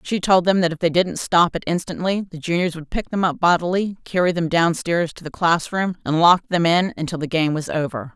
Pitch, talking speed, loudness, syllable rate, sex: 170 Hz, 235 wpm, -20 LUFS, 5.4 syllables/s, female